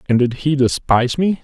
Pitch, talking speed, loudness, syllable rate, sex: 135 Hz, 210 wpm, -17 LUFS, 5.6 syllables/s, male